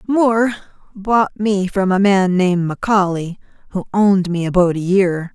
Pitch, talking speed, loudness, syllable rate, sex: 195 Hz, 155 wpm, -16 LUFS, 4.8 syllables/s, female